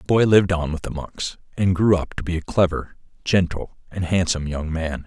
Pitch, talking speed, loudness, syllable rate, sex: 85 Hz, 225 wpm, -22 LUFS, 5.4 syllables/s, male